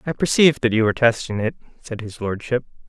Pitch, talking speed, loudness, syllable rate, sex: 120 Hz, 210 wpm, -20 LUFS, 6.6 syllables/s, male